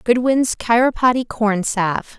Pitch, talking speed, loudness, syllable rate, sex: 230 Hz, 110 wpm, -17 LUFS, 4.3 syllables/s, female